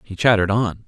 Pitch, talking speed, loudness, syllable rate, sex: 105 Hz, 205 wpm, -18 LUFS, 6.5 syllables/s, male